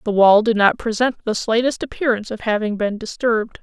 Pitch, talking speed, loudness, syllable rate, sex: 220 Hz, 200 wpm, -18 LUFS, 5.8 syllables/s, female